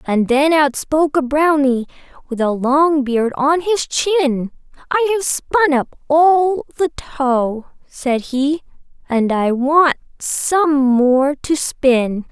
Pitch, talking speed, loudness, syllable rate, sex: 285 Hz, 135 wpm, -16 LUFS, 3.7 syllables/s, female